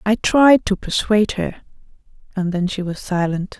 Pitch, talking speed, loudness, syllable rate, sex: 200 Hz, 165 wpm, -18 LUFS, 4.7 syllables/s, female